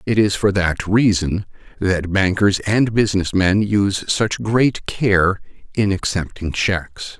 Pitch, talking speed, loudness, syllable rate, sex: 100 Hz, 140 wpm, -18 LUFS, 3.8 syllables/s, male